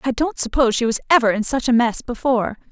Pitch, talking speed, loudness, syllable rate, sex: 245 Hz, 245 wpm, -18 LUFS, 6.6 syllables/s, female